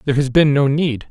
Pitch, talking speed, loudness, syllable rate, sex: 140 Hz, 270 wpm, -16 LUFS, 6.2 syllables/s, male